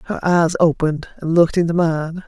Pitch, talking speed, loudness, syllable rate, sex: 165 Hz, 185 wpm, -17 LUFS, 5.3 syllables/s, female